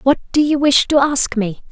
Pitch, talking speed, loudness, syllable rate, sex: 270 Hz, 245 wpm, -15 LUFS, 5.0 syllables/s, female